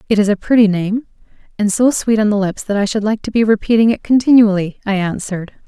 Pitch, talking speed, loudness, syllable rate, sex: 210 Hz, 235 wpm, -15 LUFS, 6.2 syllables/s, female